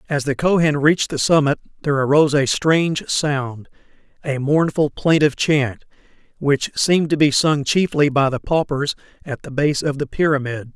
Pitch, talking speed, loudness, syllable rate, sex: 145 Hz, 160 wpm, -18 LUFS, 5.1 syllables/s, male